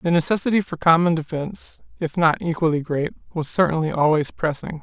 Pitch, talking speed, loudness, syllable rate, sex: 165 Hz, 160 wpm, -21 LUFS, 5.7 syllables/s, male